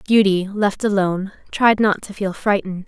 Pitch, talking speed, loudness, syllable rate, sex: 200 Hz, 165 wpm, -19 LUFS, 5.2 syllables/s, female